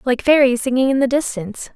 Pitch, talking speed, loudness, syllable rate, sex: 255 Hz, 205 wpm, -16 LUFS, 6.1 syllables/s, female